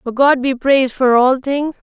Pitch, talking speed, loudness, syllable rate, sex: 265 Hz, 220 wpm, -14 LUFS, 4.6 syllables/s, female